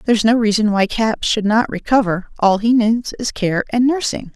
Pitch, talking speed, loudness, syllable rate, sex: 220 Hz, 205 wpm, -17 LUFS, 5.0 syllables/s, female